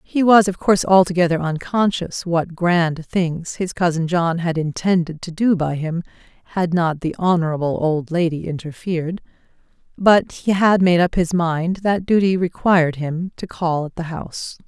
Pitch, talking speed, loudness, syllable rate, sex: 175 Hz, 170 wpm, -19 LUFS, 4.6 syllables/s, female